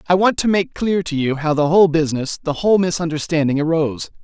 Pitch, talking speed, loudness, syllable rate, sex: 165 Hz, 215 wpm, -18 LUFS, 6.4 syllables/s, male